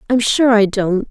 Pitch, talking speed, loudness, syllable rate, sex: 220 Hz, 220 wpm, -14 LUFS, 4.4 syllables/s, female